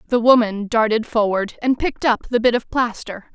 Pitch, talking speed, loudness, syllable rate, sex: 230 Hz, 195 wpm, -18 LUFS, 5.2 syllables/s, female